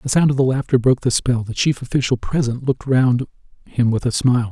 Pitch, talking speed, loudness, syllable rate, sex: 125 Hz, 240 wpm, -18 LUFS, 6.2 syllables/s, male